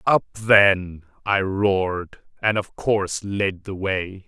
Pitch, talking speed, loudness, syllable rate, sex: 95 Hz, 140 wpm, -21 LUFS, 3.3 syllables/s, male